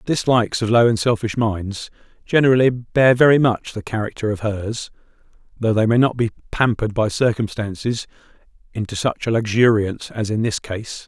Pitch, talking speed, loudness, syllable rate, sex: 110 Hz, 170 wpm, -19 LUFS, 5.3 syllables/s, male